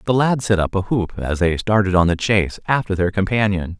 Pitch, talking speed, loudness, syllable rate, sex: 100 Hz, 235 wpm, -19 LUFS, 5.6 syllables/s, male